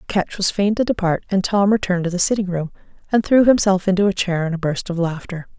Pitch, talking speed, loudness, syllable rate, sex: 190 Hz, 245 wpm, -19 LUFS, 6.1 syllables/s, female